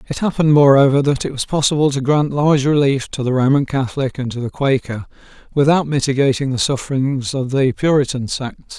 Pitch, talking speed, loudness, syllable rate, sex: 135 Hz, 185 wpm, -16 LUFS, 5.8 syllables/s, male